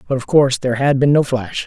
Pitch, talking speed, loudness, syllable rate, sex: 135 Hz, 290 wpm, -16 LUFS, 6.6 syllables/s, male